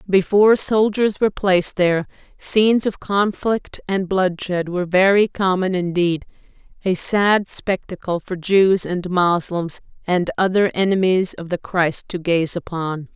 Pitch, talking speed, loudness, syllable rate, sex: 185 Hz, 130 wpm, -19 LUFS, 4.3 syllables/s, female